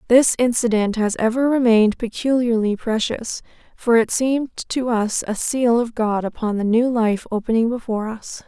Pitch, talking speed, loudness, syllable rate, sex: 230 Hz, 165 wpm, -19 LUFS, 4.8 syllables/s, female